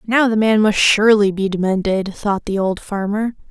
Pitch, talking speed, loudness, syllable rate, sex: 205 Hz, 190 wpm, -16 LUFS, 4.9 syllables/s, female